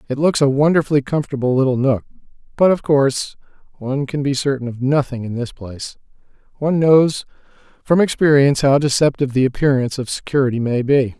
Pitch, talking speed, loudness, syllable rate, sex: 135 Hz, 165 wpm, -17 LUFS, 6.3 syllables/s, male